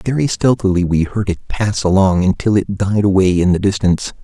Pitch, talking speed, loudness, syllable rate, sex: 100 Hz, 200 wpm, -15 LUFS, 5.5 syllables/s, male